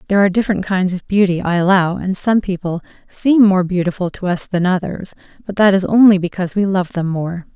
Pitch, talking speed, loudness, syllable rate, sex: 185 Hz, 215 wpm, -16 LUFS, 6.0 syllables/s, female